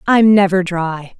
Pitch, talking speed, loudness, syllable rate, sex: 185 Hz, 150 wpm, -14 LUFS, 3.8 syllables/s, female